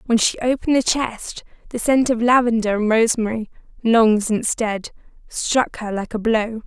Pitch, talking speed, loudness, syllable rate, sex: 230 Hz, 170 wpm, -19 LUFS, 4.9 syllables/s, female